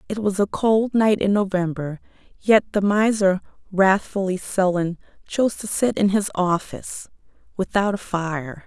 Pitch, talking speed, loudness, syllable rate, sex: 195 Hz, 145 wpm, -21 LUFS, 4.5 syllables/s, female